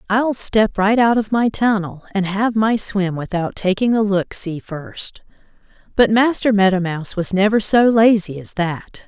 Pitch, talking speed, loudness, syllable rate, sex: 205 Hz, 180 wpm, -17 LUFS, 4.3 syllables/s, female